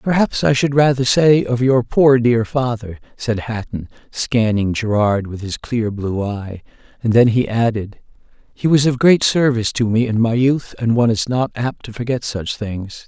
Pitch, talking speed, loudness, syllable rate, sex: 120 Hz, 195 wpm, -17 LUFS, 4.6 syllables/s, male